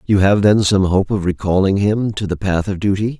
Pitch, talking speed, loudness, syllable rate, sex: 100 Hz, 245 wpm, -16 LUFS, 5.2 syllables/s, male